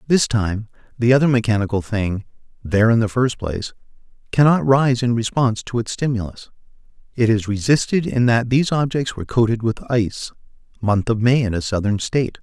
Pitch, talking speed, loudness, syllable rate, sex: 115 Hz, 170 wpm, -19 LUFS, 5.7 syllables/s, male